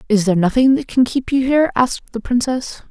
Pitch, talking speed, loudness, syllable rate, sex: 245 Hz, 225 wpm, -17 LUFS, 6.4 syllables/s, female